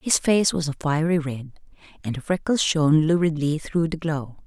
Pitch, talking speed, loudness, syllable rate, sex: 155 Hz, 190 wpm, -22 LUFS, 4.9 syllables/s, female